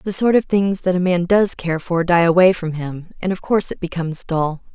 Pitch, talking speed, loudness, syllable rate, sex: 175 Hz, 255 wpm, -18 LUFS, 5.3 syllables/s, female